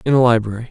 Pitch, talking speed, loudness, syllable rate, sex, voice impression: 120 Hz, 255 wpm, -15 LUFS, 8.2 syllables/s, male, very masculine, adult-like, slightly thick, slightly relaxed, slightly weak, slightly dark, soft, clear, slightly halting, slightly raspy, cool, intellectual, slightly refreshing, sincere, calm, friendly, reassuring, slightly unique, elegant, slightly wild, slightly sweet, lively, kind, slightly intense